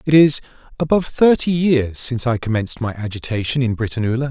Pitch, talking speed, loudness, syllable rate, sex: 125 Hz, 165 wpm, -18 LUFS, 6.2 syllables/s, male